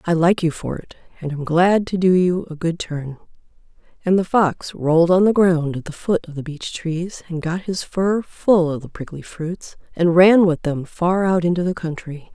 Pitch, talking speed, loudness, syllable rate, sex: 170 Hz, 225 wpm, -19 LUFS, 4.6 syllables/s, female